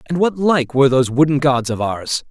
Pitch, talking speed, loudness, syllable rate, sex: 140 Hz, 235 wpm, -16 LUFS, 5.8 syllables/s, male